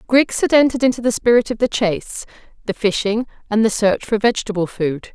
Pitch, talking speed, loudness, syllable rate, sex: 220 Hz, 200 wpm, -18 LUFS, 6.0 syllables/s, female